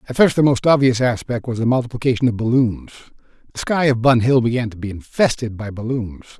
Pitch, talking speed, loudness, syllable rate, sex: 120 Hz, 205 wpm, -18 LUFS, 6.1 syllables/s, male